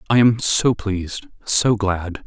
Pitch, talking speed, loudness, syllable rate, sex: 100 Hz, 160 wpm, -18 LUFS, 3.6 syllables/s, male